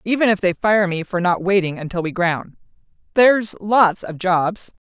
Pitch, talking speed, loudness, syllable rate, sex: 190 Hz, 185 wpm, -18 LUFS, 4.8 syllables/s, female